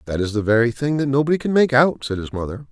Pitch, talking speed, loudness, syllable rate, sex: 130 Hz, 285 wpm, -19 LUFS, 6.7 syllables/s, male